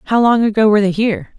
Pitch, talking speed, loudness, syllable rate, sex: 210 Hz, 260 wpm, -14 LUFS, 7.8 syllables/s, female